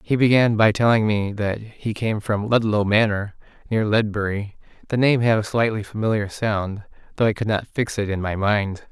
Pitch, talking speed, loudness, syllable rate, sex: 105 Hz, 195 wpm, -21 LUFS, 4.9 syllables/s, male